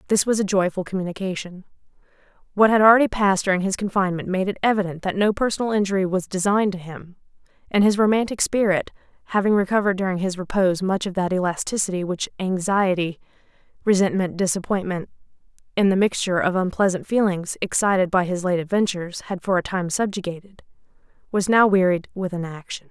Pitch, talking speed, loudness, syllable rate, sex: 190 Hz, 160 wpm, -21 LUFS, 6.4 syllables/s, female